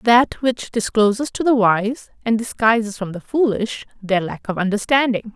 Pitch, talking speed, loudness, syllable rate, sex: 225 Hz, 170 wpm, -19 LUFS, 4.6 syllables/s, female